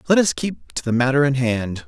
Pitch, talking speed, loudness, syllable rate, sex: 130 Hz, 255 wpm, -20 LUFS, 5.3 syllables/s, male